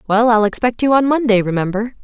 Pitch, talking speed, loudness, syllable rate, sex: 225 Hz, 205 wpm, -15 LUFS, 6.0 syllables/s, female